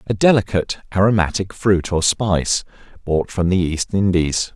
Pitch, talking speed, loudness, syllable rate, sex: 95 Hz, 145 wpm, -18 LUFS, 4.9 syllables/s, male